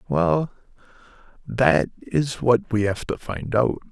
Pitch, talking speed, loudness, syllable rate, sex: 115 Hz, 140 wpm, -22 LUFS, 3.4 syllables/s, male